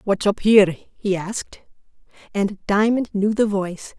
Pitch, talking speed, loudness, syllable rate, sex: 200 Hz, 150 wpm, -20 LUFS, 4.4 syllables/s, female